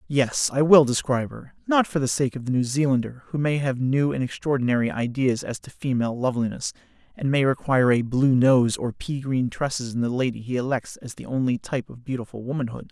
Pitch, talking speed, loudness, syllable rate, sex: 130 Hz, 215 wpm, -23 LUFS, 5.9 syllables/s, male